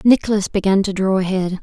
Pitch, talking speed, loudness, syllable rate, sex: 195 Hz, 185 wpm, -18 LUFS, 5.9 syllables/s, female